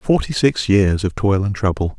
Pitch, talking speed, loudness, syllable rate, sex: 100 Hz, 210 wpm, -17 LUFS, 4.6 syllables/s, male